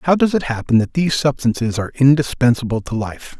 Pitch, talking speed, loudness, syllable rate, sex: 130 Hz, 195 wpm, -17 LUFS, 6.2 syllables/s, male